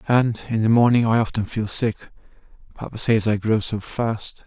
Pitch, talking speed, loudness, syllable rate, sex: 110 Hz, 175 wpm, -21 LUFS, 4.6 syllables/s, male